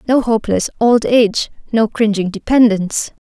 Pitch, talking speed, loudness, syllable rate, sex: 220 Hz, 130 wpm, -15 LUFS, 5.2 syllables/s, female